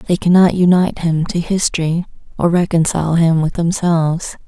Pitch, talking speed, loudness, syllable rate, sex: 170 Hz, 145 wpm, -15 LUFS, 5.2 syllables/s, female